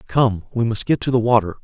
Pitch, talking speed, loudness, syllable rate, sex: 115 Hz, 255 wpm, -19 LUFS, 5.9 syllables/s, male